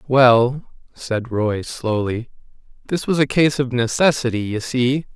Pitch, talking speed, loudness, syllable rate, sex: 125 Hz, 140 wpm, -19 LUFS, 3.9 syllables/s, male